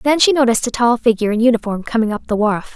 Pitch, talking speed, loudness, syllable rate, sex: 230 Hz, 260 wpm, -16 LUFS, 7.0 syllables/s, female